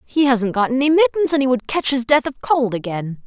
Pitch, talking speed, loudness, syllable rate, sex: 255 Hz, 255 wpm, -18 LUFS, 5.4 syllables/s, female